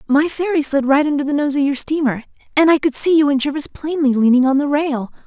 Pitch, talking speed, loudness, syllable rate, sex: 285 Hz, 250 wpm, -16 LUFS, 6.0 syllables/s, female